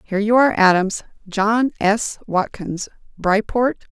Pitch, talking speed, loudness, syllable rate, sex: 210 Hz, 120 wpm, -19 LUFS, 4.4 syllables/s, female